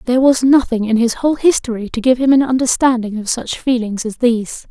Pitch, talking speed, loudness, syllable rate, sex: 245 Hz, 215 wpm, -15 LUFS, 5.9 syllables/s, female